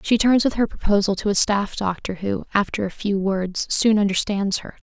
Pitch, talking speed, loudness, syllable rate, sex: 205 Hz, 210 wpm, -21 LUFS, 5.0 syllables/s, female